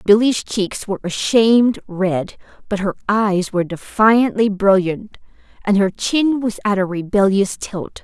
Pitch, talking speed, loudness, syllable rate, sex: 205 Hz, 150 wpm, -17 LUFS, 4.2 syllables/s, female